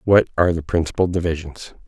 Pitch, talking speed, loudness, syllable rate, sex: 85 Hz, 160 wpm, -20 LUFS, 6.4 syllables/s, male